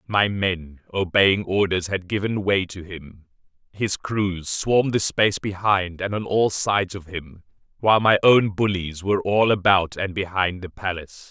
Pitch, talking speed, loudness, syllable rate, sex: 95 Hz, 170 wpm, -21 LUFS, 4.5 syllables/s, male